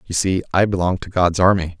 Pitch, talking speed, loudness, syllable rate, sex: 90 Hz, 235 wpm, -18 LUFS, 5.7 syllables/s, male